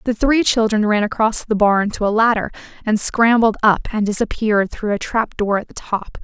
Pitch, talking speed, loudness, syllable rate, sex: 215 Hz, 210 wpm, -17 LUFS, 5.1 syllables/s, female